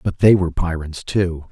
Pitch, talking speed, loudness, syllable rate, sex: 85 Hz, 200 wpm, -19 LUFS, 5.0 syllables/s, male